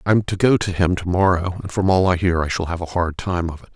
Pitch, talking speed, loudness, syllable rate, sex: 90 Hz, 335 wpm, -20 LUFS, 6.2 syllables/s, male